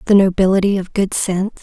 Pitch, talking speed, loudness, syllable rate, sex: 190 Hz, 185 wpm, -16 LUFS, 6.2 syllables/s, female